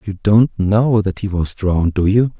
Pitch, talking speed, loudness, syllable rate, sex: 100 Hz, 225 wpm, -16 LUFS, 4.6 syllables/s, male